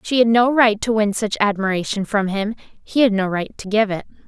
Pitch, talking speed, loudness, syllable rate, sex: 210 Hz, 225 wpm, -19 LUFS, 5.1 syllables/s, female